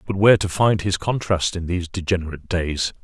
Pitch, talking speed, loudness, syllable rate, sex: 90 Hz, 200 wpm, -21 LUFS, 6.0 syllables/s, male